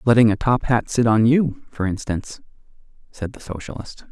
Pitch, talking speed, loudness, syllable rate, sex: 115 Hz, 175 wpm, -20 LUFS, 5.2 syllables/s, male